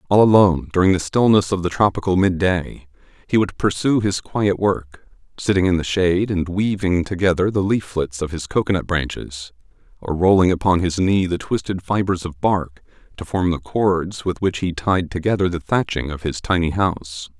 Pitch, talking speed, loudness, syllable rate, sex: 90 Hz, 185 wpm, -19 LUFS, 5.1 syllables/s, male